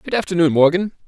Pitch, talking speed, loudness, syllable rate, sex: 180 Hz, 170 wpm, -17 LUFS, 6.9 syllables/s, male